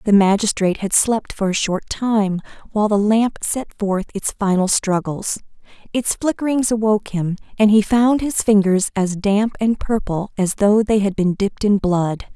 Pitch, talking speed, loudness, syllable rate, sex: 205 Hz, 180 wpm, -18 LUFS, 4.7 syllables/s, female